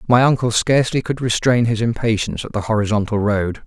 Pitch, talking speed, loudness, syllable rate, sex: 115 Hz, 180 wpm, -18 LUFS, 6.0 syllables/s, male